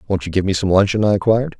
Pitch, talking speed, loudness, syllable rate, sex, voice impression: 100 Hz, 300 wpm, -17 LUFS, 7.7 syllables/s, male, very masculine, very middle-aged, very thick, slightly relaxed, powerful, slightly bright, hard, soft, clear, fluent, cute, cool, slightly refreshing, sincere, very calm, mature, very friendly, very reassuring, very unique, elegant, wild, sweet, lively, kind, very modest, slightly light